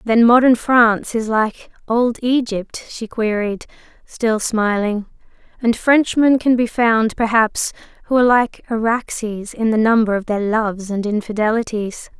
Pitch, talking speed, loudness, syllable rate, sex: 225 Hz, 145 wpm, -17 LUFS, 4.3 syllables/s, female